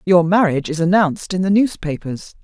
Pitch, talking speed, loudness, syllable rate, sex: 180 Hz, 170 wpm, -17 LUFS, 5.7 syllables/s, female